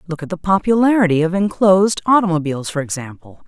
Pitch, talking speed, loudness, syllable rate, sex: 180 Hz, 155 wpm, -16 LUFS, 6.5 syllables/s, female